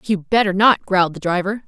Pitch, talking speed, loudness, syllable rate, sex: 195 Hz, 215 wpm, -17 LUFS, 5.8 syllables/s, female